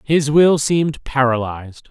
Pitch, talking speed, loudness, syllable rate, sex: 135 Hz, 125 wpm, -16 LUFS, 4.4 syllables/s, male